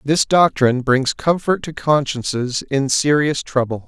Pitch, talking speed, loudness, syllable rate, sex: 140 Hz, 140 wpm, -17 LUFS, 4.3 syllables/s, male